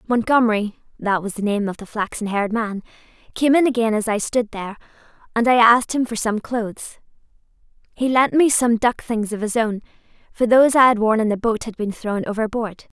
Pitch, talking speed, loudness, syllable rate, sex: 225 Hz, 200 wpm, -19 LUFS, 5.7 syllables/s, female